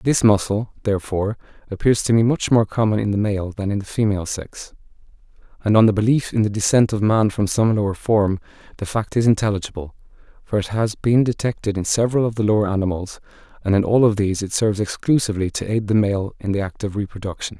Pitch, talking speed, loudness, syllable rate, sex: 105 Hz, 210 wpm, -20 LUFS, 6.3 syllables/s, male